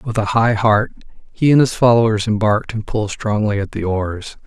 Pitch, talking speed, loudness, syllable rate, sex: 110 Hz, 200 wpm, -17 LUFS, 5.3 syllables/s, male